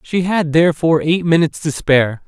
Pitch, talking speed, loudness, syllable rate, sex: 160 Hz, 185 wpm, -15 LUFS, 6.0 syllables/s, male